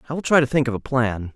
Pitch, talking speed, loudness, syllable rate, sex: 130 Hz, 355 wpm, -20 LUFS, 6.8 syllables/s, male